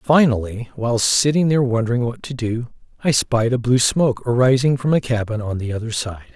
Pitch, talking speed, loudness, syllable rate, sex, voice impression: 120 Hz, 200 wpm, -19 LUFS, 5.7 syllables/s, male, masculine, adult-like, slightly cool, refreshing, slightly sincere